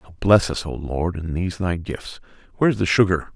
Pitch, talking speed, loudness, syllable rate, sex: 90 Hz, 195 wpm, -21 LUFS, 5.6 syllables/s, male